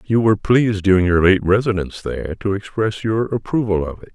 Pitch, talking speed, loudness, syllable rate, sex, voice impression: 100 Hz, 205 wpm, -18 LUFS, 6.0 syllables/s, male, very masculine, middle-aged, thick, slightly muffled, calm, wild